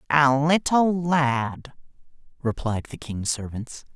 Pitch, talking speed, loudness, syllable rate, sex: 140 Hz, 105 wpm, -23 LUFS, 3.4 syllables/s, male